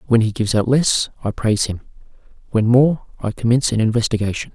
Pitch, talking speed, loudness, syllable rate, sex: 115 Hz, 185 wpm, -18 LUFS, 6.5 syllables/s, male